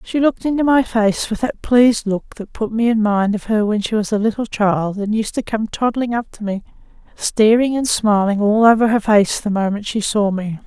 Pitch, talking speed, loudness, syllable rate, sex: 220 Hz, 235 wpm, -17 LUFS, 5.1 syllables/s, female